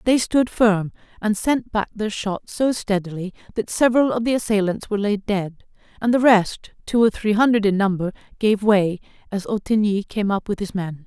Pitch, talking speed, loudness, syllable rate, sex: 210 Hz, 195 wpm, -21 LUFS, 5.0 syllables/s, female